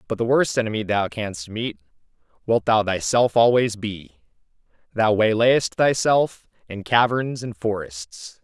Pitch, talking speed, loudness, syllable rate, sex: 110 Hz, 135 wpm, -21 LUFS, 4.0 syllables/s, male